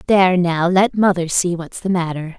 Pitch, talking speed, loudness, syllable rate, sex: 180 Hz, 200 wpm, -17 LUFS, 5.0 syllables/s, female